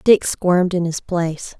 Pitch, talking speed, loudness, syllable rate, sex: 175 Hz, 190 wpm, -19 LUFS, 4.7 syllables/s, female